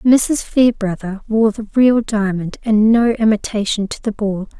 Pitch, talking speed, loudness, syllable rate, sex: 215 Hz, 155 wpm, -16 LUFS, 4.2 syllables/s, female